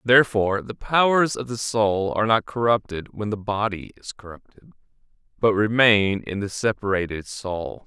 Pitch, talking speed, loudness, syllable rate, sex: 105 Hz, 155 wpm, -22 LUFS, 4.9 syllables/s, male